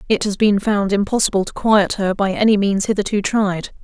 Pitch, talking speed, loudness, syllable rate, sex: 200 Hz, 205 wpm, -17 LUFS, 5.3 syllables/s, female